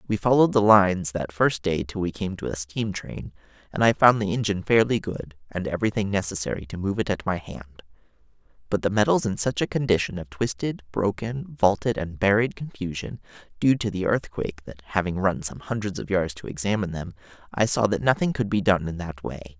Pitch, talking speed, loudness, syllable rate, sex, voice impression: 100 Hz, 210 wpm, -24 LUFS, 5.7 syllables/s, male, masculine, adult-like, slightly middle-aged, slightly thick, slightly relaxed, slightly weak, slightly dark, slightly hard, slightly muffled, fluent, slightly raspy, intellectual, slightly refreshing, sincere, very calm, mature, slightly friendly, slightly reassuring, very unique, slightly elegant, slightly wild, slightly lively, modest